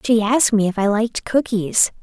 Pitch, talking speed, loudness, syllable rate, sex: 220 Hz, 210 wpm, -18 LUFS, 5.4 syllables/s, female